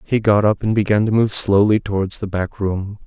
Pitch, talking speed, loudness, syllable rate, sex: 105 Hz, 235 wpm, -17 LUFS, 5.1 syllables/s, male